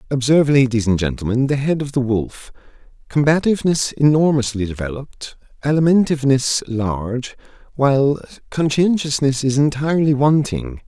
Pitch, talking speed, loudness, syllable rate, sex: 135 Hz, 105 wpm, -18 LUFS, 5.3 syllables/s, male